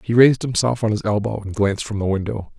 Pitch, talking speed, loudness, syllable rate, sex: 110 Hz, 255 wpm, -20 LUFS, 6.7 syllables/s, male